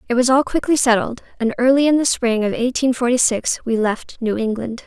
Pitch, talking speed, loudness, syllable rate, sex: 245 Hz, 220 wpm, -18 LUFS, 5.5 syllables/s, female